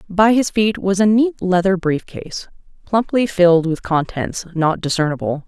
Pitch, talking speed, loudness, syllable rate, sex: 185 Hz, 165 wpm, -17 LUFS, 4.6 syllables/s, female